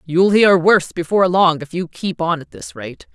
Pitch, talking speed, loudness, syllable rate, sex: 175 Hz, 230 wpm, -16 LUFS, 5.0 syllables/s, female